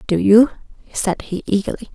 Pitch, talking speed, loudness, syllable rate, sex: 205 Hz, 155 wpm, -17 LUFS, 5.4 syllables/s, female